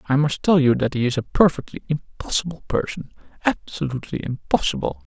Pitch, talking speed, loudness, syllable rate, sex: 140 Hz, 140 wpm, -22 LUFS, 5.9 syllables/s, male